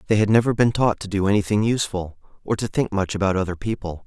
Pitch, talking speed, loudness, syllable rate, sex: 100 Hz, 235 wpm, -21 LUFS, 6.6 syllables/s, male